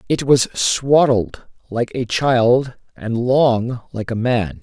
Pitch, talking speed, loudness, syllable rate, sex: 120 Hz, 145 wpm, -17 LUFS, 3.1 syllables/s, male